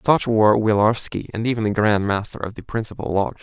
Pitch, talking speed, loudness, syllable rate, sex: 110 Hz, 210 wpm, -20 LUFS, 6.2 syllables/s, male